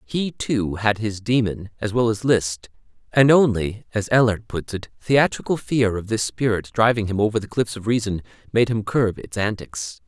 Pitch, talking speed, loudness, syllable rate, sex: 105 Hz, 190 wpm, -21 LUFS, 4.8 syllables/s, male